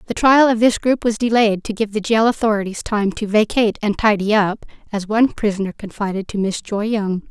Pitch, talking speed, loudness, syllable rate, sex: 210 Hz, 215 wpm, -18 LUFS, 5.6 syllables/s, female